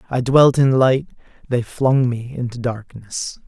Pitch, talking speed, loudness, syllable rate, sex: 125 Hz, 155 wpm, -18 LUFS, 3.9 syllables/s, male